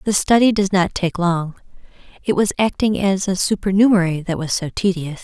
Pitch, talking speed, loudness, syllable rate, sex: 190 Hz, 185 wpm, -18 LUFS, 5.4 syllables/s, female